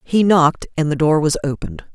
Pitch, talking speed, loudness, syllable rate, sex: 160 Hz, 215 wpm, -17 LUFS, 5.9 syllables/s, female